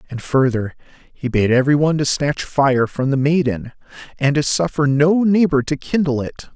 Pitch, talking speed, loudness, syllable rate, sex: 140 Hz, 185 wpm, -17 LUFS, 5.2 syllables/s, male